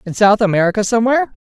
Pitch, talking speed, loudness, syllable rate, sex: 215 Hz, 165 wpm, -14 LUFS, 8.0 syllables/s, female